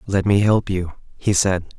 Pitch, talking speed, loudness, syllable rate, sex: 95 Hz, 200 wpm, -19 LUFS, 4.1 syllables/s, male